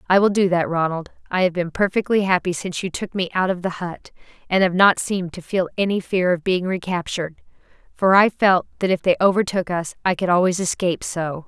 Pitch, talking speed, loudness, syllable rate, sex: 180 Hz, 220 wpm, -20 LUFS, 5.8 syllables/s, female